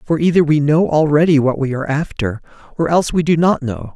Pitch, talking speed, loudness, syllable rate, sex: 150 Hz, 230 wpm, -15 LUFS, 6.1 syllables/s, male